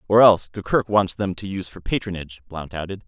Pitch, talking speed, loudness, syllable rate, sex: 95 Hz, 215 wpm, -21 LUFS, 6.3 syllables/s, male